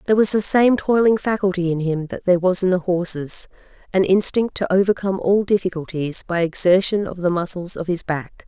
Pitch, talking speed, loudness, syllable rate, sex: 185 Hz, 190 wpm, -19 LUFS, 5.6 syllables/s, female